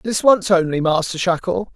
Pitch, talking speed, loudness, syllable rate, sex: 180 Hz, 170 wpm, -17 LUFS, 4.7 syllables/s, male